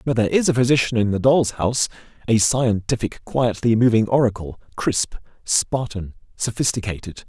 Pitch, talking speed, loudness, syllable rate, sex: 115 Hz, 140 wpm, -20 LUFS, 5.2 syllables/s, male